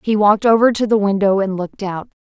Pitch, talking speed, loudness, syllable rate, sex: 205 Hz, 235 wpm, -16 LUFS, 6.4 syllables/s, female